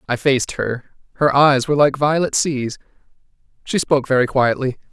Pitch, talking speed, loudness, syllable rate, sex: 135 Hz, 160 wpm, -17 LUFS, 5.6 syllables/s, male